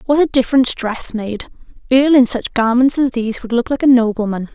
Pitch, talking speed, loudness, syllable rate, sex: 245 Hz, 210 wpm, -15 LUFS, 6.1 syllables/s, female